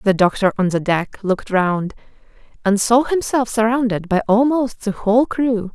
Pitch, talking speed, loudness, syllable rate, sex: 220 Hz, 165 wpm, -18 LUFS, 4.8 syllables/s, female